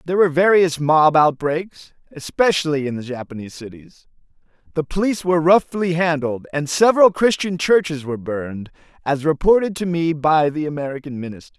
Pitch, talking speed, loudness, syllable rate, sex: 160 Hz, 150 wpm, -18 LUFS, 5.7 syllables/s, male